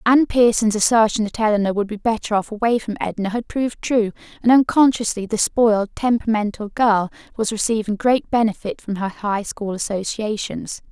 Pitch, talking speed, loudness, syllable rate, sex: 220 Hz, 165 wpm, -19 LUFS, 5.5 syllables/s, female